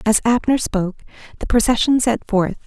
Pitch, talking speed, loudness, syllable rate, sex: 225 Hz, 160 wpm, -18 LUFS, 5.3 syllables/s, female